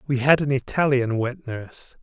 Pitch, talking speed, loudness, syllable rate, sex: 130 Hz, 180 wpm, -22 LUFS, 4.9 syllables/s, male